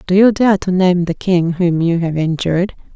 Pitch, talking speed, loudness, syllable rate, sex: 180 Hz, 225 wpm, -15 LUFS, 4.9 syllables/s, female